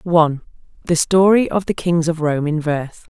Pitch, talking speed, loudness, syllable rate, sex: 165 Hz, 190 wpm, -17 LUFS, 5.5 syllables/s, female